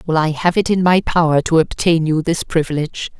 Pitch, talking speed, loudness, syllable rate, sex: 165 Hz, 225 wpm, -16 LUFS, 5.7 syllables/s, female